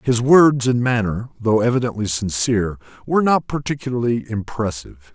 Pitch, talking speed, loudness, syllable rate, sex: 120 Hz, 130 wpm, -19 LUFS, 5.5 syllables/s, male